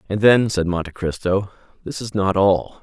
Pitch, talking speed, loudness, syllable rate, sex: 95 Hz, 190 wpm, -19 LUFS, 4.7 syllables/s, male